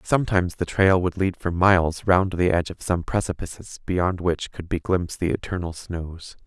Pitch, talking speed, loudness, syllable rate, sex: 90 Hz, 195 wpm, -23 LUFS, 5.1 syllables/s, male